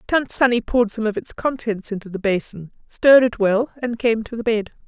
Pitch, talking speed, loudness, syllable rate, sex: 225 Hz, 220 wpm, -20 LUFS, 5.5 syllables/s, female